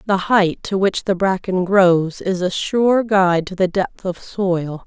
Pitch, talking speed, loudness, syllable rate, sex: 190 Hz, 195 wpm, -18 LUFS, 3.9 syllables/s, female